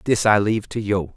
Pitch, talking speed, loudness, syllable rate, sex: 105 Hz, 260 wpm, -20 LUFS, 5.9 syllables/s, male